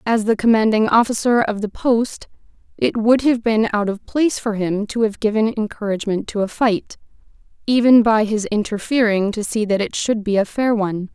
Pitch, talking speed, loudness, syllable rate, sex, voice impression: 220 Hz, 190 wpm, -18 LUFS, 5.2 syllables/s, female, feminine, adult-like, slightly relaxed, slightly bright, soft, clear, fluent, friendly, elegant, lively, slightly intense